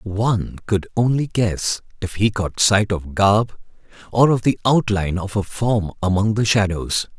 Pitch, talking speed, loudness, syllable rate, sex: 105 Hz, 165 wpm, -19 LUFS, 4.3 syllables/s, male